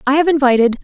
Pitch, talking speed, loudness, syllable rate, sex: 275 Hz, 215 wpm, -13 LUFS, 7.6 syllables/s, female